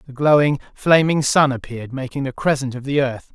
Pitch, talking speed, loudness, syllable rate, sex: 135 Hz, 195 wpm, -19 LUFS, 5.6 syllables/s, male